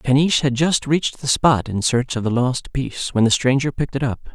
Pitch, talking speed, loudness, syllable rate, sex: 130 Hz, 250 wpm, -19 LUFS, 5.6 syllables/s, male